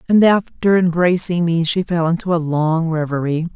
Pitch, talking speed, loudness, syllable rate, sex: 170 Hz, 170 wpm, -17 LUFS, 4.8 syllables/s, female